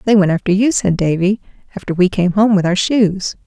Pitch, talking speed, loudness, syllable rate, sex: 195 Hz, 225 wpm, -15 LUFS, 5.5 syllables/s, female